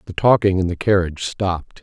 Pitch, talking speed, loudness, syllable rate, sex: 95 Hz, 195 wpm, -19 LUFS, 6.0 syllables/s, male